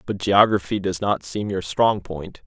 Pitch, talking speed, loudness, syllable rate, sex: 95 Hz, 195 wpm, -21 LUFS, 4.3 syllables/s, male